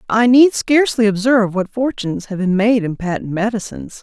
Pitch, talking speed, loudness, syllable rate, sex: 220 Hz, 180 wpm, -16 LUFS, 5.7 syllables/s, female